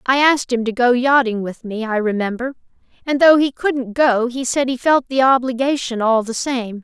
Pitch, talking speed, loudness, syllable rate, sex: 250 Hz, 210 wpm, -17 LUFS, 5.0 syllables/s, female